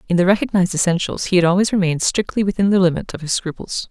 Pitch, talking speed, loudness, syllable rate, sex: 180 Hz, 230 wpm, -18 LUFS, 7.2 syllables/s, female